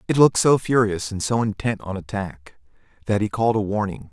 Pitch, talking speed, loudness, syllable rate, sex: 105 Hz, 205 wpm, -21 LUFS, 5.8 syllables/s, male